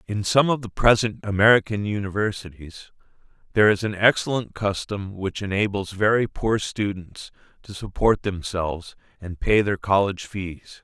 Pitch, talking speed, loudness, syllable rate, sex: 100 Hz, 140 wpm, -22 LUFS, 4.8 syllables/s, male